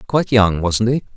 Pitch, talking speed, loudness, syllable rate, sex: 110 Hz, 205 wpm, -16 LUFS, 5.4 syllables/s, male